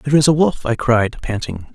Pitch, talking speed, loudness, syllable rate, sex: 125 Hz, 240 wpm, -17 LUFS, 5.4 syllables/s, male